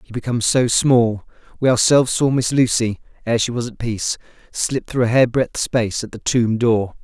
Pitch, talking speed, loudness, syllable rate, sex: 120 Hz, 190 wpm, -18 LUFS, 5.2 syllables/s, male